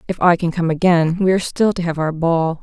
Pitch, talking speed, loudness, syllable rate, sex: 170 Hz, 275 wpm, -17 LUFS, 5.7 syllables/s, female